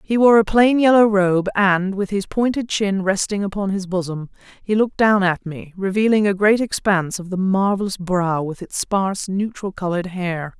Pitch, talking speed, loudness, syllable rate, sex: 195 Hz, 195 wpm, -19 LUFS, 4.9 syllables/s, female